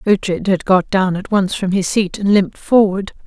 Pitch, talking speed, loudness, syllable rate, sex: 190 Hz, 220 wpm, -16 LUFS, 4.9 syllables/s, female